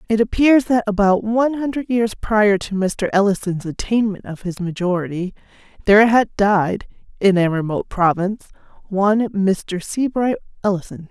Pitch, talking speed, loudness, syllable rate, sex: 205 Hz, 140 wpm, -18 LUFS, 5.0 syllables/s, female